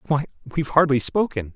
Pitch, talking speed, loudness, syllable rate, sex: 140 Hz, 155 wpm, -22 LUFS, 6.1 syllables/s, male